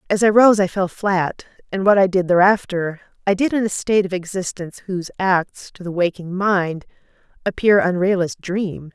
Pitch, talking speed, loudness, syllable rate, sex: 185 Hz, 190 wpm, -19 LUFS, 5.1 syllables/s, female